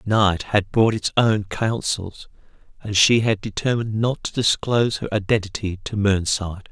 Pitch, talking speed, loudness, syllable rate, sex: 105 Hz, 150 wpm, -21 LUFS, 4.7 syllables/s, male